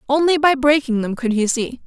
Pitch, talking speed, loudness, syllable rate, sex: 265 Hz, 225 wpm, -17 LUFS, 5.4 syllables/s, female